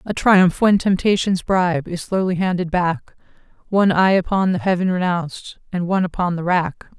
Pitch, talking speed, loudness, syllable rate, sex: 180 Hz, 170 wpm, -18 LUFS, 5.2 syllables/s, female